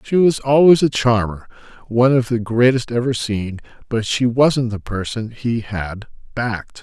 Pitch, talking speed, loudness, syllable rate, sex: 120 Hz, 165 wpm, -18 LUFS, 4.5 syllables/s, male